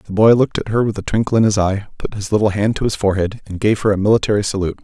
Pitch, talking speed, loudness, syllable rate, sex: 105 Hz, 300 wpm, -17 LUFS, 7.3 syllables/s, male